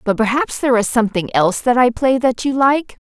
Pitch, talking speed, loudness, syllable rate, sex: 245 Hz, 215 wpm, -16 LUFS, 5.9 syllables/s, female